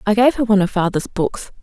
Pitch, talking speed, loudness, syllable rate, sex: 210 Hz, 260 wpm, -17 LUFS, 6.3 syllables/s, female